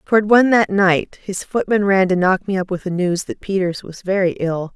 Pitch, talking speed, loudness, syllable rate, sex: 190 Hz, 240 wpm, -17 LUFS, 5.2 syllables/s, female